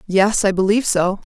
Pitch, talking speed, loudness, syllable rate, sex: 200 Hz, 180 wpm, -17 LUFS, 5.5 syllables/s, female